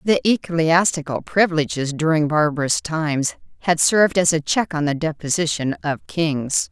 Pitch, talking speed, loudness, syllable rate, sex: 160 Hz, 145 wpm, -19 LUFS, 4.9 syllables/s, female